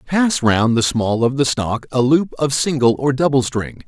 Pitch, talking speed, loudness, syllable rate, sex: 130 Hz, 215 wpm, -17 LUFS, 4.4 syllables/s, male